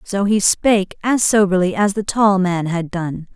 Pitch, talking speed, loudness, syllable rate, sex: 190 Hz, 195 wpm, -17 LUFS, 4.5 syllables/s, female